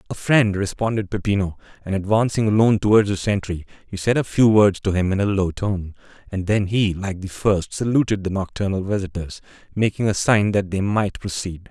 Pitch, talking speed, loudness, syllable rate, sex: 100 Hz, 195 wpm, -20 LUFS, 5.4 syllables/s, male